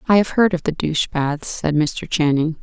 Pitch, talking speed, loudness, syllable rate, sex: 160 Hz, 230 wpm, -19 LUFS, 4.9 syllables/s, female